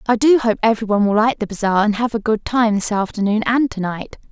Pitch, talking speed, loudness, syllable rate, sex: 220 Hz, 250 wpm, -17 LUFS, 6.1 syllables/s, female